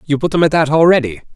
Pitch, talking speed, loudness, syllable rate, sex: 150 Hz, 265 wpm, -13 LUFS, 7.0 syllables/s, male